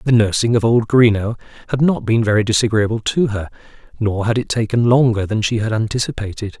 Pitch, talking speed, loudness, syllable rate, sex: 110 Hz, 190 wpm, -17 LUFS, 5.9 syllables/s, male